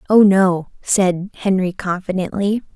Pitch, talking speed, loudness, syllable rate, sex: 190 Hz, 110 wpm, -17 LUFS, 4.0 syllables/s, female